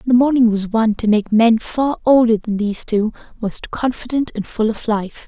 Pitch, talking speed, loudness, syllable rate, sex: 225 Hz, 205 wpm, -17 LUFS, 5.1 syllables/s, female